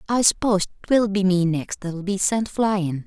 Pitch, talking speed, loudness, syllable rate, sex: 195 Hz, 195 wpm, -21 LUFS, 4.0 syllables/s, female